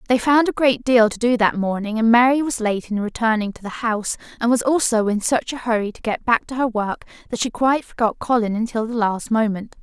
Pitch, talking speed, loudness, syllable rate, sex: 230 Hz, 245 wpm, -20 LUFS, 5.7 syllables/s, female